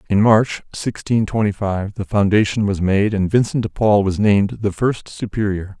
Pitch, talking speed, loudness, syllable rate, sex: 105 Hz, 185 wpm, -18 LUFS, 4.7 syllables/s, male